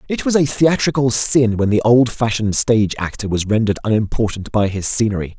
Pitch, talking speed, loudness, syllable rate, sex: 115 Hz, 180 wpm, -17 LUFS, 5.9 syllables/s, male